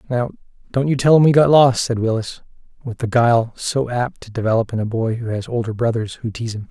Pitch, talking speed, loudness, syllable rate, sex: 120 Hz, 240 wpm, -18 LUFS, 6.1 syllables/s, male